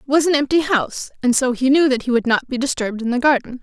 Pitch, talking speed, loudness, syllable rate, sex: 260 Hz, 300 wpm, -18 LUFS, 6.6 syllables/s, female